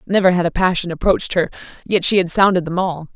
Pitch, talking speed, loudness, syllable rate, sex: 180 Hz, 230 wpm, -17 LUFS, 6.5 syllables/s, female